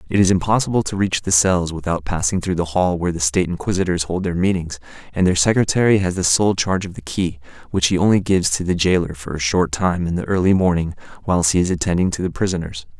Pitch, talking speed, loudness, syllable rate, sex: 90 Hz, 235 wpm, -19 LUFS, 6.4 syllables/s, male